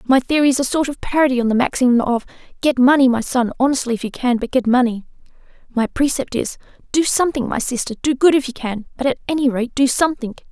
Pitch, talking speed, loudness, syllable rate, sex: 260 Hz, 230 wpm, -18 LUFS, 6.4 syllables/s, female